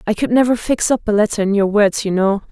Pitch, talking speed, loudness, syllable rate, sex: 210 Hz, 285 wpm, -16 LUFS, 6.1 syllables/s, female